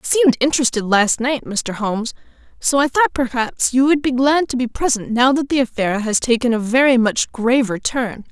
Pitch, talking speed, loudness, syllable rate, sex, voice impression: 250 Hz, 210 wpm, -17 LUFS, 5.7 syllables/s, female, feminine, adult-like, tensed, unique, slightly intense